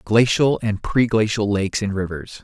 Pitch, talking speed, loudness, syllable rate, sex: 105 Hz, 150 wpm, -20 LUFS, 4.7 syllables/s, male